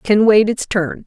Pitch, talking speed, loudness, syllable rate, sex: 205 Hz, 225 wpm, -15 LUFS, 3.9 syllables/s, female